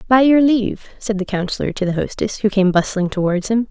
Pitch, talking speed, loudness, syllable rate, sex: 210 Hz, 225 wpm, -18 LUFS, 5.8 syllables/s, female